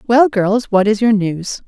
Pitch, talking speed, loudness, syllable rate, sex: 210 Hz, 215 wpm, -15 LUFS, 4.0 syllables/s, female